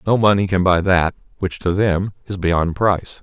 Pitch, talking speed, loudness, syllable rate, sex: 95 Hz, 205 wpm, -18 LUFS, 4.8 syllables/s, male